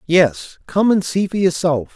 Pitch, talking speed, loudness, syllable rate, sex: 175 Hz, 185 wpm, -17 LUFS, 4.2 syllables/s, male